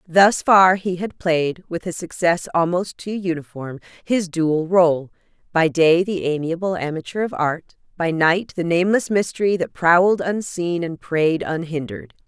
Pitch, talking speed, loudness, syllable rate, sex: 170 Hz, 155 wpm, -20 LUFS, 4.5 syllables/s, female